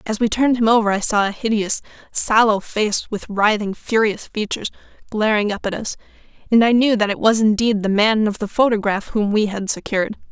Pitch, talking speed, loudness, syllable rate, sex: 215 Hz, 205 wpm, -18 LUFS, 5.6 syllables/s, female